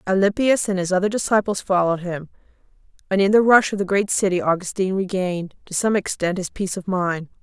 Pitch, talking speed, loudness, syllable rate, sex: 190 Hz, 195 wpm, -20 LUFS, 6.2 syllables/s, female